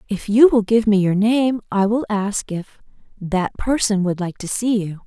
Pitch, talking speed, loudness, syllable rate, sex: 210 Hz, 200 wpm, -19 LUFS, 4.3 syllables/s, female